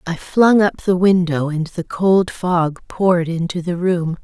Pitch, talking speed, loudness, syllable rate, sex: 175 Hz, 185 wpm, -17 LUFS, 4.0 syllables/s, female